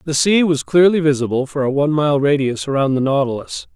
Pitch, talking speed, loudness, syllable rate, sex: 145 Hz, 210 wpm, -16 LUFS, 5.9 syllables/s, male